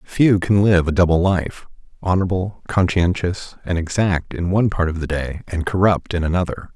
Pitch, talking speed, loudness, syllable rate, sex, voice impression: 90 Hz, 170 wpm, -19 LUFS, 5.2 syllables/s, male, masculine, middle-aged, thick, slightly powerful, clear, fluent, cool, intellectual, calm, friendly, reassuring, wild, kind